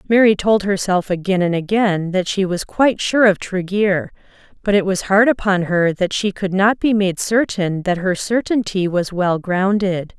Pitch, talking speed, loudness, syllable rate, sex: 195 Hz, 185 wpm, -17 LUFS, 4.6 syllables/s, female